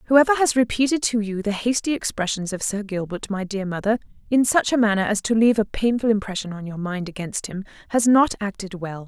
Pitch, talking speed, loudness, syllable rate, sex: 215 Hz, 220 wpm, -22 LUFS, 5.9 syllables/s, female